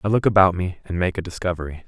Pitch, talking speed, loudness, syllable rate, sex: 90 Hz, 255 wpm, -21 LUFS, 7.0 syllables/s, male